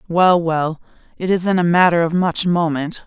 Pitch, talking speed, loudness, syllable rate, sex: 170 Hz, 175 wpm, -17 LUFS, 4.3 syllables/s, female